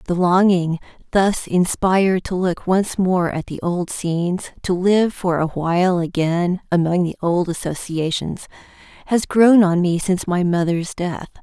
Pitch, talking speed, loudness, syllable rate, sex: 180 Hz, 160 wpm, -19 LUFS, 4.3 syllables/s, female